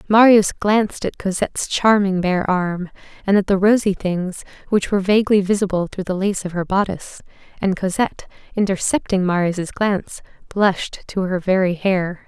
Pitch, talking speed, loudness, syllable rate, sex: 190 Hz, 155 wpm, -19 LUFS, 5.1 syllables/s, female